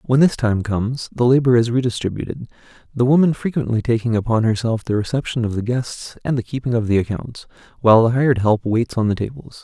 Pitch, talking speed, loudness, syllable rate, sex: 120 Hz, 205 wpm, -19 LUFS, 6.1 syllables/s, male